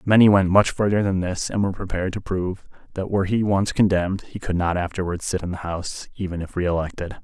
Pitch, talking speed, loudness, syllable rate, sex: 95 Hz, 225 wpm, -22 LUFS, 6.3 syllables/s, male